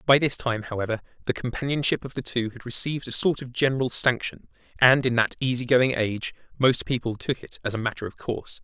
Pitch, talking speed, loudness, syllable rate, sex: 125 Hz, 215 wpm, -25 LUFS, 6.1 syllables/s, male